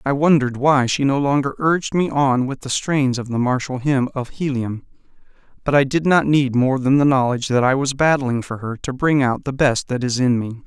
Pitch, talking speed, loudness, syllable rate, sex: 135 Hz, 235 wpm, -19 LUFS, 5.3 syllables/s, male